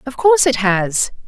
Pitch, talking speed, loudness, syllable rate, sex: 245 Hz, 190 wpm, -15 LUFS, 4.8 syllables/s, female